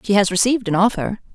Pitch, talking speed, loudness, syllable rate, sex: 205 Hz, 225 wpm, -18 LUFS, 7.0 syllables/s, female